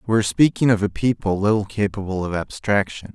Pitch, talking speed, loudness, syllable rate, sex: 105 Hz, 190 wpm, -20 LUFS, 6.0 syllables/s, male